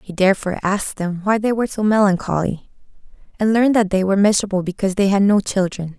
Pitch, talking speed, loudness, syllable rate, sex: 200 Hz, 200 wpm, -18 LUFS, 7.0 syllables/s, female